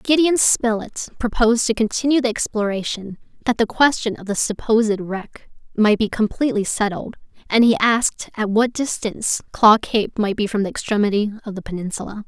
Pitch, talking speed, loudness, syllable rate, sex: 220 Hz, 165 wpm, -19 LUFS, 5.4 syllables/s, female